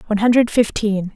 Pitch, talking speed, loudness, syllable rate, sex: 215 Hz, 155 wpm, -17 LUFS, 6.2 syllables/s, female